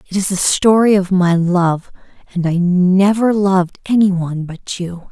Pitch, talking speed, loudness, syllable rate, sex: 185 Hz, 175 wpm, -15 LUFS, 4.6 syllables/s, female